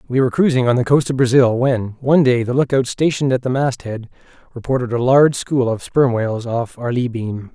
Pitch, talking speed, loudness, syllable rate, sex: 125 Hz, 225 wpm, -17 LUFS, 5.8 syllables/s, male